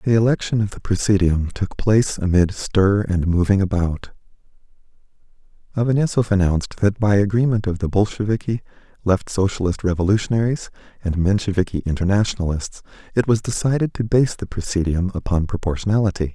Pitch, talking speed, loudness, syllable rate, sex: 100 Hz, 130 wpm, -20 LUFS, 5.8 syllables/s, male